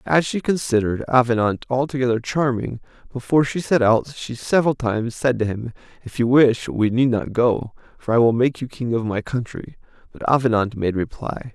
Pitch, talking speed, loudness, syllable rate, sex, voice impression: 120 Hz, 190 wpm, -20 LUFS, 5.4 syllables/s, male, masculine, adult-like, tensed, powerful, bright, clear, fluent, intellectual, friendly, reassuring, wild, lively, kind